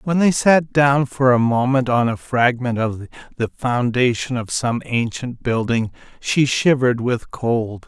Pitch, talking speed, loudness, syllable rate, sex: 125 Hz, 160 wpm, -19 LUFS, 4.1 syllables/s, male